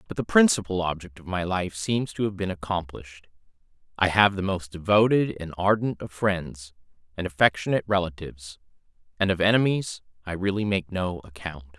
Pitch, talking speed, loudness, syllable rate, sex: 95 Hz, 155 wpm, -25 LUFS, 5.4 syllables/s, male